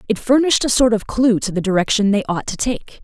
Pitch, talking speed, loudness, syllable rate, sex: 225 Hz, 255 wpm, -17 LUFS, 6.1 syllables/s, female